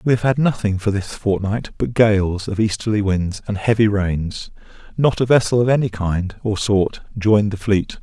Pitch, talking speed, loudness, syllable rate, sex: 105 Hz, 195 wpm, -19 LUFS, 4.8 syllables/s, male